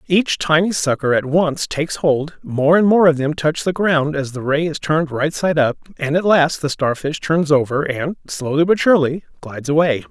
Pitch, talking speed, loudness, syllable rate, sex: 155 Hz, 215 wpm, -17 LUFS, 5.0 syllables/s, male